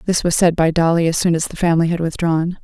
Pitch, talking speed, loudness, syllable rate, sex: 170 Hz, 275 wpm, -17 LUFS, 6.4 syllables/s, female